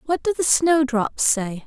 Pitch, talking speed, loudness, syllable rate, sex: 275 Hz, 180 wpm, -20 LUFS, 3.9 syllables/s, female